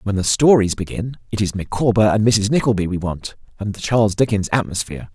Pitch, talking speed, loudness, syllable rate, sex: 105 Hz, 200 wpm, -18 LUFS, 6.0 syllables/s, male